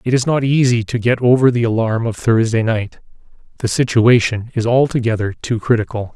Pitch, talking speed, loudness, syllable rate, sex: 115 Hz, 165 wpm, -16 LUFS, 5.4 syllables/s, male